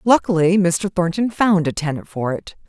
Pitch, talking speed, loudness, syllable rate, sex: 180 Hz, 180 wpm, -19 LUFS, 4.8 syllables/s, female